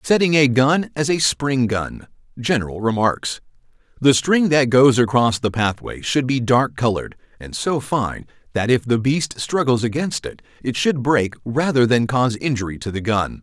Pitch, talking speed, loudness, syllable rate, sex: 125 Hz, 170 wpm, -19 LUFS, 4.7 syllables/s, male